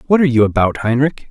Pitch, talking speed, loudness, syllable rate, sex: 130 Hz, 230 wpm, -15 LUFS, 7.1 syllables/s, male